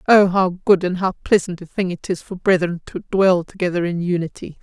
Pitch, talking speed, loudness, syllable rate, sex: 180 Hz, 220 wpm, -19 LUFS, 5.3 syllables/s, female